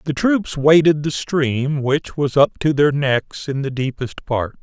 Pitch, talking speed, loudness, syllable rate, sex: 145 Hz, 195 wpm, -18 LUFS, 3.8 syllables/s, male